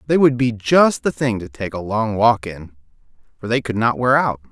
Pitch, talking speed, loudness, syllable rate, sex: 115 Hz, 240 wpm, -18 LUFS, 5.0 syllables/s, male